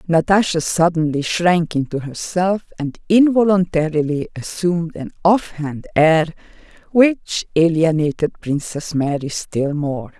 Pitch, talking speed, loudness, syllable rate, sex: 165 Hz, 100 wpm, -18 LUFS, 4.2 syllables/s, female